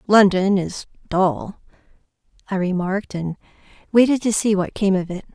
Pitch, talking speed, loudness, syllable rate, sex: 195 Hz, 145 wpm, -20 LUFS, 5.0 syllables/s, female